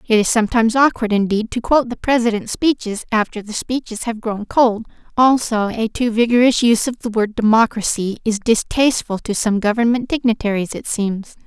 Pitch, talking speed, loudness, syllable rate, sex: 225 Hz, 175 wpm, -17 LUFS, 5.5 syllables/s, female